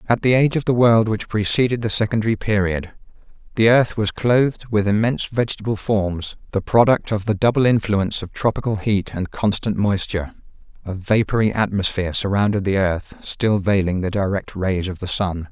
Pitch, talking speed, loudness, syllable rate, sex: 105 Hz, 175 wpm, -19 LUFS, 5.5 syllables/s, male